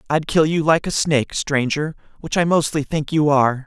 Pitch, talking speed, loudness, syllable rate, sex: 150 Hz, 215 wpm, -19 LUFS, 5.3 syllables/s, male